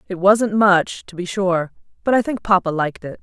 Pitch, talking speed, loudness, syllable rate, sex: 190 Hz, 225 wpm, -18 LUFS, 5.1 syllables/s, female